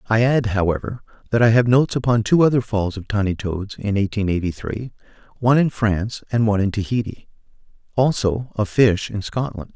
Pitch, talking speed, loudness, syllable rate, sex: 110 Hz, 185 wpm, -20 LUFS, 5.7 syllables/s, male